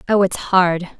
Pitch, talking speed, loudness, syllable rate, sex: 185 Hz, 180 wpm, -17 LUFS, 3.7 syllables/s, female